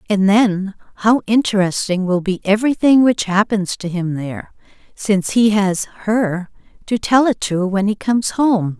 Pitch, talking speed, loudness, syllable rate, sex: 205 Hz, 165 wpm, -17 LUFS, 4.6 syllables/s, female